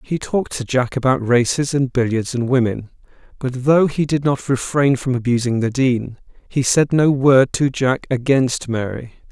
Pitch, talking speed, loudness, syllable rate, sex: 130 Hz, 180 wpm, -18 LUFS, 4.6 syllables/s, male